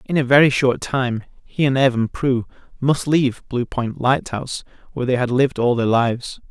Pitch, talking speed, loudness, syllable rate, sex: 130 Hz, 205 wpm, -19 LUFS, 5.3 syllables/s, male